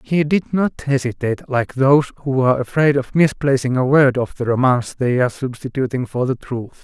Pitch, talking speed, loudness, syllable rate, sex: 130 Hz, 195 wpm, -18 LUFS, 5.5 syllables/s, male